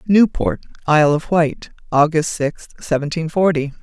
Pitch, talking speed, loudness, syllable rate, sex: 160 Hz, 125 wpm, -18 LUFS, 4.6 syllables/s, female